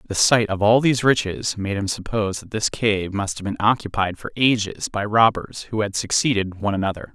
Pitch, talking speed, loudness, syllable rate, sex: 105 Hz, 210 wpm, -21 LUFS, 5.6 syllables/s, male